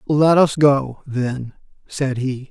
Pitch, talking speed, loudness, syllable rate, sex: 135 Hz, 145 wpm, -18 LUFS, 3.0 syllables/s, male